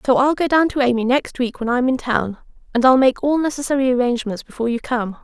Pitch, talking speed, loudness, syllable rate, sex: 250 Hz, 240 wpm, -18 LUFS, 6.3 syllables/s, female